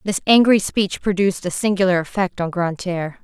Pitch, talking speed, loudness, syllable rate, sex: 190 Hz, 165 wpm, -18 LUFS, 5.6 syllables/s, female